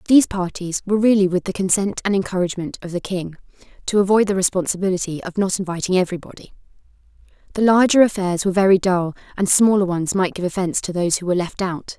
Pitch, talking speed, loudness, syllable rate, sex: 190 Hz, 190 wpm, -19 LUFS, 6.8 syllables/s, female